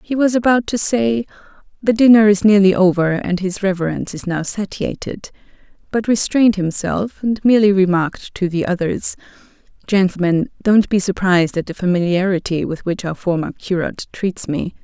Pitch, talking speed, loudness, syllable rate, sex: 195 Hz, 160 wpm, -17 LUFS, 5.3 syllables/s, female